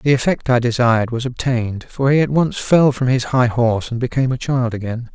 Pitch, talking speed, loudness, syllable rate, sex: 125 Hz, 235 wpm, -17 LUFS, 5.7 syllables/s, male